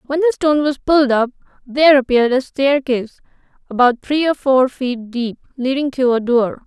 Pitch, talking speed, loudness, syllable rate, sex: 265 Hz, 180 wpm, -16 LUFS, 5.4 syllables/s, female